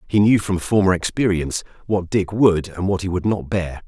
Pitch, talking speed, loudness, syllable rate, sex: 95 Hz, 215 wpm, -20 LUFS, 5.2 syllables/s, male